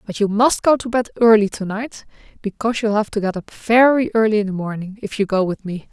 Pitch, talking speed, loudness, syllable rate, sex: 215 Hz, 255 wpm, -18 LUFS, 5.9 syllables/s, female